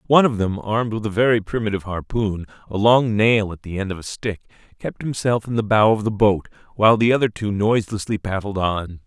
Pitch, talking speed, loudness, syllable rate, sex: 105 Hz, 205 wpm, -20 LUFS, 5.9 syllables/s, male